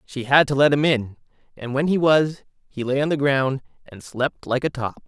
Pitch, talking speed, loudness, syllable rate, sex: 140 Hz, 235 wpm, -21 LUFS, 5.0 syllables/s, male